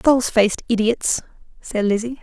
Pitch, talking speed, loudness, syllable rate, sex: 230 Hz, 135 wpm, -19 LUFS, 5.2 syllables/s, female